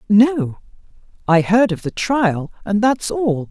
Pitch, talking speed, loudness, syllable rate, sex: 210 Hz, 155 wpm, -17 LUFS, 3.5 syllables/s, female